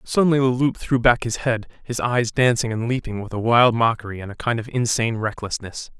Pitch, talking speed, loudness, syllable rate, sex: 115 Hz, 220 wpm, -21 LUFS, 5.7 syllables/s, male